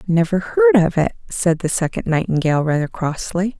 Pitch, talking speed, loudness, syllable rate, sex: 185 Hz, 165 wpm, -18 LUFS, 5.1 syllables/s, female